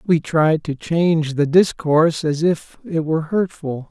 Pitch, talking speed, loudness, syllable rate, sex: 160 Hz, 170 wpm, -18 LUFS, 4.2 syllables/s, male